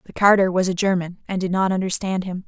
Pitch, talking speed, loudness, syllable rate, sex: 185 Hz, 240 wpm, -20 LUFS, 6.3 syllables/s, female